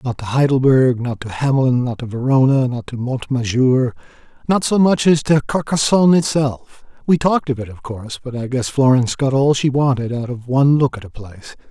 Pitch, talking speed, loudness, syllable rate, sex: 130 Hz, 205 wpm, -17 LUFS, 5.7 syllables/s, male